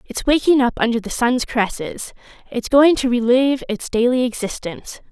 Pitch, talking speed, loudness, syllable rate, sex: 245 Hz, 165 wpm, -18 LUFS, 5.6 syllables/s, female